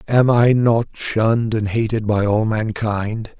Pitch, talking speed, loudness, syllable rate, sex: 110 Hz, 160 wpm, -18 LUFS, 3.8 syllables/s, male